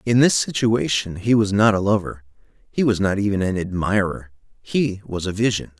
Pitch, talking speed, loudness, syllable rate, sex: 100 Hz, 185 wpm, -20 LUFS, 5.1 syllables/s, male